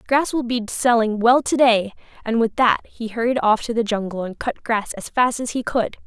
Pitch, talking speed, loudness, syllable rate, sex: 230 Hz, 235 wpm, -20 LUFS, 5.0 syllables/s, female